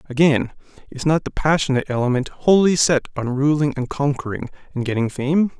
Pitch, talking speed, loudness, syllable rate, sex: 140 Hz, 160 wpm, -20 LUFS, 5.5 syllables/s, male